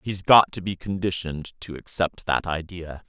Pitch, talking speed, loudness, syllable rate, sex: 90 Hz, 175 wpm, -23 LUFS, 4.8 syllables/s, male